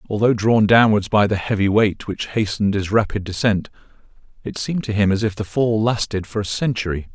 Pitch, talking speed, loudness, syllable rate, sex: 105 Hz, 200 wpm, -19 LUFS, 5.7 syllables/s, male